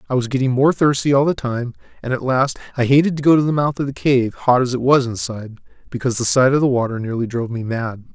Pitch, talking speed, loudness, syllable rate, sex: 130 Hz, 265 wpm, -18 LUFS, 6.5 syllables/s, male